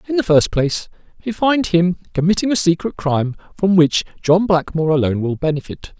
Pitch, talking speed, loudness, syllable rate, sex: 175 Hz, 180 wpm, -17 LUFS, 5.8 syllables/s, male